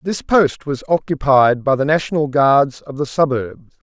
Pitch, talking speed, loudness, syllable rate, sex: 140 Hz, 170 wpm, -16 LUFS, 4.4 syllables/s, male